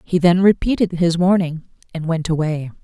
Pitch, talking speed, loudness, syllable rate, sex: 170 Hz, 170 wpm, -18 LUFS, 5.1 syllables/s, female